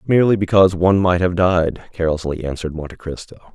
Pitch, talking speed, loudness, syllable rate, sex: 90 Hz, 170 wpm, -17 LUFS, 6.7 syllables/s, male